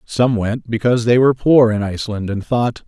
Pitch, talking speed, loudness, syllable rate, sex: 115 Hz, 210 wpm, -16 LUFS, 5.5 syllables/s, male